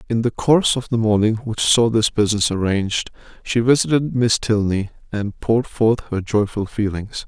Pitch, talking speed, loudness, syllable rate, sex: 110 Hz, 175 wpm, -19 LUFS, 5.0 syllables/s, male